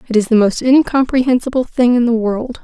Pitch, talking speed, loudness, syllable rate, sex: 240 Hz, 205 wpm, -14 LUFS, 5.6 syllables/s, female